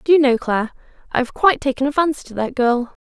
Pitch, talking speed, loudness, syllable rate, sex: 270 Hz, 235 wpm, -18 LUFS, 6.8 syllables/s, female